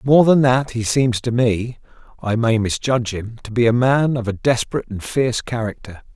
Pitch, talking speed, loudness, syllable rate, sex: 120 Hz, 205 wpm, -18 LUFS, 4.7 syllables/s, male